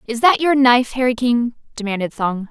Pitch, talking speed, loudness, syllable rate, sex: 240 Hz, 190 wpm, -17 LUFS, 5.6 syllables/s, female